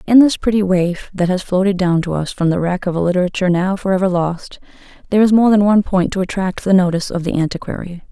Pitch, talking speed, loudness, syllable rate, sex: 185 Hz, 235 wpm, -16 LUFS, 6.5 syllables/s, female